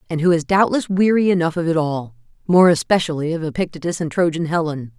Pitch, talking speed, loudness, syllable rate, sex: 165 Hz, 180 wpm, -18 LUFS, 6.1 syllables/s, female